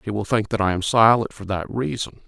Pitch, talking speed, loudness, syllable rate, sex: 105 Hz, 265 wpm, -21 LUFS, 5.7 syllables/s, male